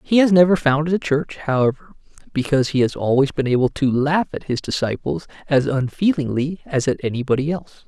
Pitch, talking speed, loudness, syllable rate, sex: 145 Hz, 185 wpm, -19 LUFS, 5.8 syllables/s, male